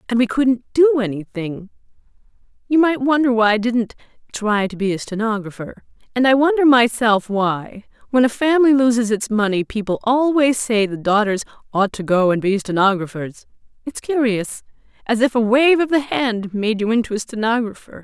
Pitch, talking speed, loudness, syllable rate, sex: 230 Hz, 165 wpm, -18 LUFS, 5.1 syllables/s, female